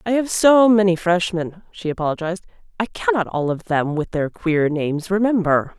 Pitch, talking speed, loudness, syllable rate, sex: 185 Hz, 175 wpm, -19 LUFS, 5.1 syllables/s, female